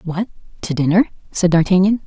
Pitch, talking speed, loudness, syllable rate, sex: 185 Hz, 145 wpm, -17 LUFS, 5.7 syllables/s, female